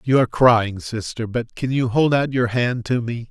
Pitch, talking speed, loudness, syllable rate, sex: 120 Hz, 235 wpm, -20 LUFS, 4.7 syllables/s, male